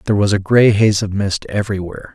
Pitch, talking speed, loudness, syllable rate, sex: 100 Hz, 225 wpm, -15 LUFS, 6.5 syllables/s, male